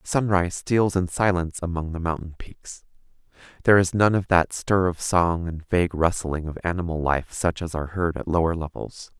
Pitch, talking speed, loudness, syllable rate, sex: 85 Hz, 190 wpm, -23 LUFS, 5.3 syllables/s, male